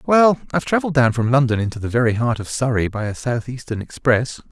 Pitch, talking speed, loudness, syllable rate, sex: 125 Hz, 225 wpm, -19 LUFS, 6.2 syllables/s, male